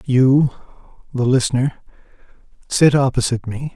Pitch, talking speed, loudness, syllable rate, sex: 130 Hz, 95 wpm, -17 LUFS, 5.0 syllables/s, male